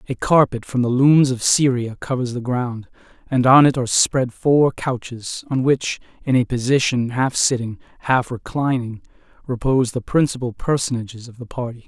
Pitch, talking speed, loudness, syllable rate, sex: 125 Hz, 165 wpm, -19 LUFS, 4.9 syllables/s, male